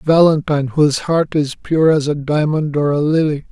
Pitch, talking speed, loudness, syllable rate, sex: 150 Hz, 190 wpm, -16 LUFS, 4.8 syllables/s, male